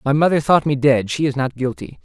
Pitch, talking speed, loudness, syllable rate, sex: 140 Hz, 265 wpm, -18 LUFS, 5.7 syllables/s, male